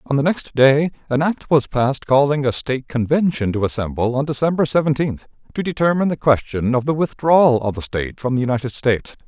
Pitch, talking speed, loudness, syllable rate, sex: 135 Hz, 200 wpm, -18 LUFS, 6.0 syllables/s, male